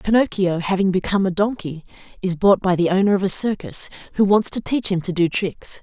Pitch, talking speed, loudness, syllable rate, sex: 190 Hz, 215 wpm, -19 LUFS, 5.7 syllables/s, female